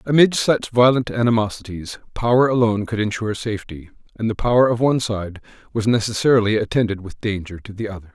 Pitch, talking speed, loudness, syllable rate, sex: 110 Hz, 170 wpm, -19 LUFS, 6.3 syllables/s, male